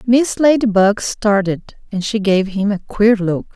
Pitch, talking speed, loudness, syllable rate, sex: 210 Hz, 170 wpm, -16 LUFS, 4.1 syllables/s, female